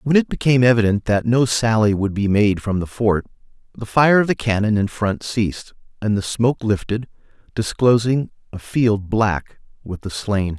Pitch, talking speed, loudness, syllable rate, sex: 110 Hz, 180 wpm, -19 LUFS, 4.9 syllables/s, male